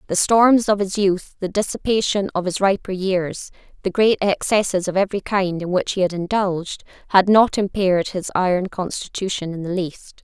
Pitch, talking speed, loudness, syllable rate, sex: 190 Hz, 180 wpm, -20 LUFS, 5.1 syllables/s, female